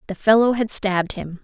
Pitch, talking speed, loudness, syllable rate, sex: 205 Hz, 210 wpm, -19 LUFS, 5.6 syllables/s, female